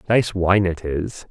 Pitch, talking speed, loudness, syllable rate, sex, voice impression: 95 Hz, 185 wpm, -20 LUFS, 3.6 syllables/s, male, masculine, middle-aged, slightly relaxed, slightly powerful, bright, soft, muffled, friendly, reassuring, wild, lively, kind, slightly modest